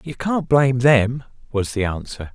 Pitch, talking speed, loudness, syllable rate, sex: 120 Hz, 180 wpm, -19 LUFS, 4.5 syllables/s, male